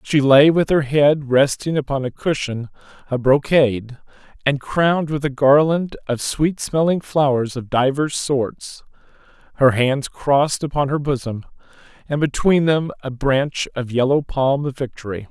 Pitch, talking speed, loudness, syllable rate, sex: 140 Hz, 155 wpm, -18 LUFS, 4.4 syllables/s, male